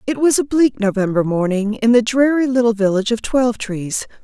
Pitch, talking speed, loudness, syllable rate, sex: 230 Hz, 200 wpm, -17 LUFS, 5.5 syllables/s, female